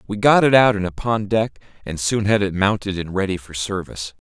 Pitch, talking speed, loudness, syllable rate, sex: 100 Hz, 225 wpm, -19 LUFS, 5.6 syllables/s, male